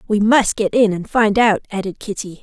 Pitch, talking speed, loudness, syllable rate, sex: 210 Hz, 225 wpm, -17 LUFS, 5.1 syllables/s, female